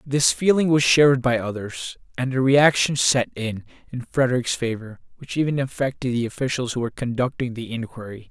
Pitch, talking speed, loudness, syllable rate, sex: 125 Hz, 175 wpm, -21 LUFS, 5.4 syllables/s, male